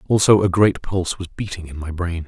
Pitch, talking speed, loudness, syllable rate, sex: 90 Hz, 235 wpm, -20 LUFS, 5.7 syllables/s, male